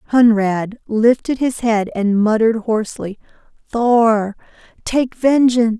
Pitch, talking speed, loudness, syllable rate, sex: 225 Hz, 105 wpm, -16 LUFS, 4.1 syllables/s, female